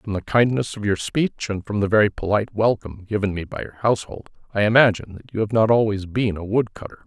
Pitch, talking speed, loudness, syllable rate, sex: 105 Hz, 230 wpm, -21 LUFS, 6.3 syllables/s, male